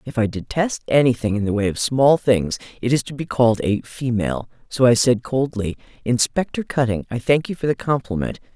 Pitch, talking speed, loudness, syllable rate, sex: 120 Hz, 205 wpm, -20 LUFS, 5.5 syllables/s, female